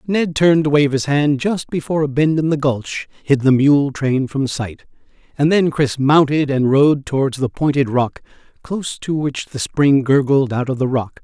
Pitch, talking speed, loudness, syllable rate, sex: 140 Hz, 210 wpm, -17 LUFS, 4.7 syllables/s, male